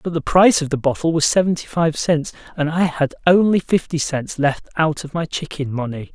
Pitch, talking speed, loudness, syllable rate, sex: 155 Hz, 215 wpm, -19 LUFS, 5.3 syllables/s, male